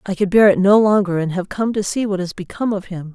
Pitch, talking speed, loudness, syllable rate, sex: 195 Hz, 305 wpm, -17 LUFS, 6.3 syllables/s, female